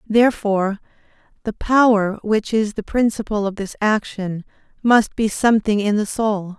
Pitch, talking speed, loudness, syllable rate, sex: 210 Hz, 145 wpm, -19 LUFS, 4.7 syllables/s, female